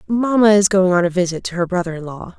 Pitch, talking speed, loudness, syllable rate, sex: 185 Hz, 275 wpm, -16 LUFS, 6.3 syllables/s, female